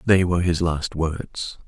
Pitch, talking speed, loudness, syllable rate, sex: 85 Hz, 180 wpm, -23 LUFS, 4.0 syllables/s, male